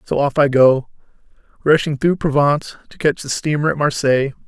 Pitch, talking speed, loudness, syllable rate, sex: 145 Hz, 175 wpm, -17 LUFS, 5.6 syllables/s, male